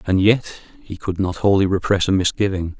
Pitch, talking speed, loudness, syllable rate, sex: 95 Hz, 195 wpm, -19 LUFS, 5.3 syllables/s, male